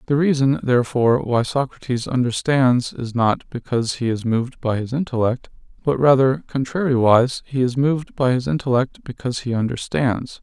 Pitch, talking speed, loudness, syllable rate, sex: 125 Hz, 155 wpm, -20 LUFS, 5.4 syllables/s, male